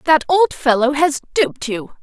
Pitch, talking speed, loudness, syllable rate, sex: 280 Hz, 180 wpm, -16 LUFS, 4.5 syllables/s, female